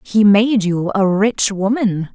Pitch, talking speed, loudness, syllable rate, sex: 205 Hz, 170 wpm, -15 LUFS, 3.5 syllables/s, female